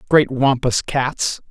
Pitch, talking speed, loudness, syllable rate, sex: 135 Hz, 120 wpm, -18 LUFS, 3.2 syllables/s, male